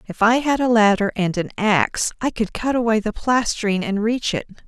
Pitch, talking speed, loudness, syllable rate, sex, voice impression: 220 Hz, 220 wpm, -20 LUFS, 5.2 syllables/s, female, very feminine, slightly young, very thin, tensed, slightly powerful, bright, slightly soft, clear, very cute, intellectual, very refreshing, very sincere, calm, friendly, very reassuring, slightly unique, slightly elegant, wild, sweet, slightly lively, kind, sharp